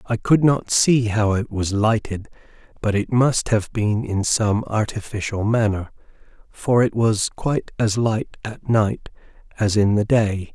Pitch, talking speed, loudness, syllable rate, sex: 110 Hz, 165 wpm, -20 LUFS, 4.0 syllables/s, male